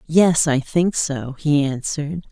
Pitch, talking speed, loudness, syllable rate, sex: 150 Hz, 155 wpm, -19 LUFS, 3.8 syllables/s, female